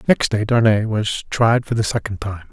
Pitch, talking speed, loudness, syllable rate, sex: 110 Hz, 215 wpm, -18 LUFS, 4.7 syllables/s, male